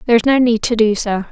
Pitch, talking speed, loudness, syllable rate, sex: 225 Hz, 320 wpm, -14 LUFS, 7.1 syllables/s, female